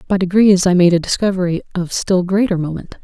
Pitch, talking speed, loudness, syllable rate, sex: 185 Hz, 200 wpm, -15 LUFS, 5.9 syllables/s, female